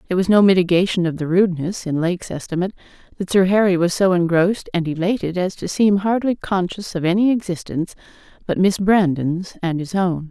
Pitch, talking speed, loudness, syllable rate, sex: 180 Hz, 185 wpm, -19 LUFS, 5.9 syllables/s, female